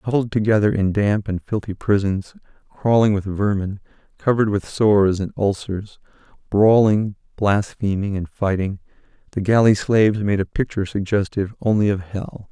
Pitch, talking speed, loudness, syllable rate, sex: 105 Hz, 140 wpm, -20 LUFS, 5.0 syllables/s, male